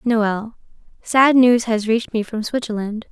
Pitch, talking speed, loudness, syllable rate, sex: 225 Hz, 135 wpm, -18 LUFS, 4.3 syllables/s, female